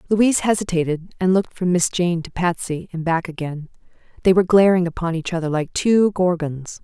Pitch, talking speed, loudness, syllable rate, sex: 175 Hz, 185 wpm, -20 LUFS, 5.6 syllables/s, female